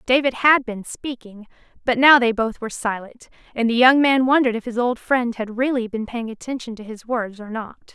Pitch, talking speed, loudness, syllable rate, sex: 240 Hz, 220 wpm, -20 LUFS, 5.4 syllables/s, female